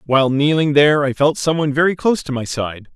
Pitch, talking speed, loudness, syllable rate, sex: 145 Hz, 225 wpm, -16 LUFS, 6.4 syllables/s, male